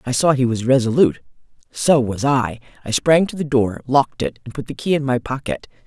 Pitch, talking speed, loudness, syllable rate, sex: 130 Hz, 225 wpm, -19 LUFS, 5.7 syllables/s, female